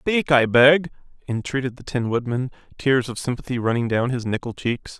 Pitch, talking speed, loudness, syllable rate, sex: 125 Hz, 180 wpm, -21 LUFS, 5.1 syllables/s, male